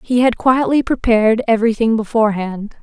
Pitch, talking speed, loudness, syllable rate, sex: 230 Hz, 125 wpm, -15 LUFS, 5.8 syllables/s, female